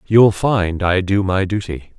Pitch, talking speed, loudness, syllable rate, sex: 95 Hz, 180 wpm, -17 LUFS, 3.8 syllables/s, male